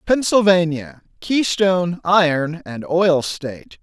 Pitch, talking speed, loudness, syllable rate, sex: 175 Hz, 95 wpm, -18 LUFS, 3.8 syllables/s, male